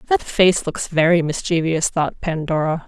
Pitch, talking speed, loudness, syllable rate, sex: 170 Hz, 145 wpm, -19 LUFS, 4.2 syllables/s, female